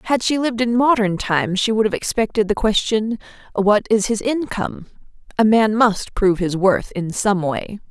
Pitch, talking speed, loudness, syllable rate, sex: 215 Hz, 190 wpm, -18 LUFS, 5.0 syllables/s, female